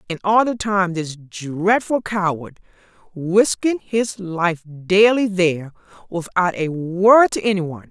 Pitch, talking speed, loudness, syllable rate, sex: 185 Hz, 135 wpm, -18 LUFS, 3.9 syllables/s, female